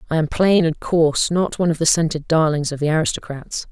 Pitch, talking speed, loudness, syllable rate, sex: 160 Hz, 225 wpm, -19 LUFS, 6.0 syllables/s, female